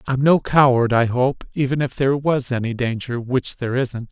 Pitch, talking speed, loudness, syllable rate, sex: 130 Hz, 205 wpm, -19 LUFS, 5.0 syllables/s, male